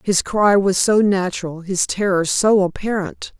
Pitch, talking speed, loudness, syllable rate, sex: 190 Hz, 160 wpm, -17 LUFS, 4.3 syllables/s, female